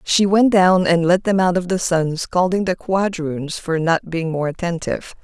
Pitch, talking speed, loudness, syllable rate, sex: 175 Hz, 205 wpm, -18 LUFS, 4.5 syllables/s, female